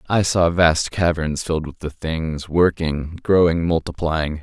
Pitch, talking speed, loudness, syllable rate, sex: 80 Hz, 150 wpm, -20 LUFS, 4.1 syllables/s, male